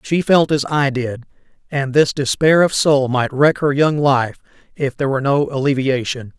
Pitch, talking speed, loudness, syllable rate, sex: 140 Hz, 190 wpm, -17 LUFS, 4.8 syllables/s, male